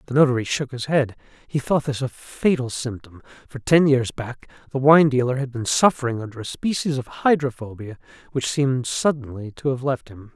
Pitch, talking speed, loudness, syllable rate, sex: 130 Hz, 190 wpm, -21 LUFS, 5.3 syllables/s, male